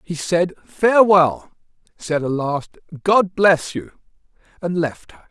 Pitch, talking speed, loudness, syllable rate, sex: 170 Hz, 135 wpm, -18 LUFS, 3.9 syllables/s, male